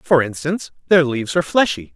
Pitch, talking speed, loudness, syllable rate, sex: 145 Hz, 185 wpm, -18 LUFS, 6.3 syllables/s, male